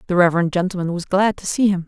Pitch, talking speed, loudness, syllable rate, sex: 180 Hz, 255 wpm, -19 LUFS, 7.1 syllables/s, female